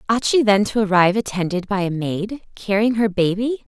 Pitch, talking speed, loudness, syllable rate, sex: 205 Hz, 190 wpm, -19 LUFS, 5.4 syllables/s, female